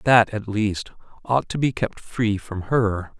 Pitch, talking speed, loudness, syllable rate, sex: 110 Hz, 190 wpm, -23 LUFS, 3.6 syllables/s, male